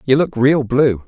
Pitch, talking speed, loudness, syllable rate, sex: 135 Hz, 225 wpm, -15 LUFS, 4.3 syllables/s, male